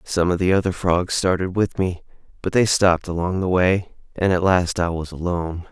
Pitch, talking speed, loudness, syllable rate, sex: 90 Hz, 210 wpm, -20 LUFS, 5.2 syllables/s, male